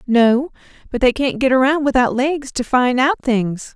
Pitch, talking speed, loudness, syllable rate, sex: 255 Hz, 190 wpm, -17 LUFS, 4.5 syllables/s, female